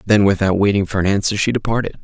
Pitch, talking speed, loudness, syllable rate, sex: 100 Hz, 235 wpm, -17 LUFS, 7.0 syllables/s, male